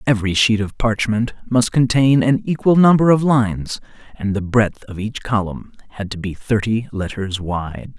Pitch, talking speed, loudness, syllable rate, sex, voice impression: 110 Hz, 175 wpm, -18 LUFS, 4.7 syllables/s, male, very masculine, very adult-like, middle-aged, very thick, tensed, very powerful, slightly dark, soft, slightly clear, fluent, very cool, intellectual, sincere, very calm, very mature, friendly, very reassuring, unique, slightly elegant, very wild, sweet, slightly lively, very kind, slightly modest